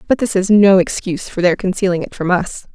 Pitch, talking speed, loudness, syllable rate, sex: 190 Hz, 240 wpm, -15 LUFS, 5.9 syllables/s, female